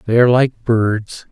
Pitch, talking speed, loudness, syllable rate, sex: 115 Hz, 185 wpm, -15 LUFS, 4.3 syllables/s, male